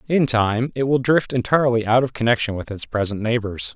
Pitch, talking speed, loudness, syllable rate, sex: 120 Hz, 210 wpm, -20 LUFS, 5.6 syllables/s, male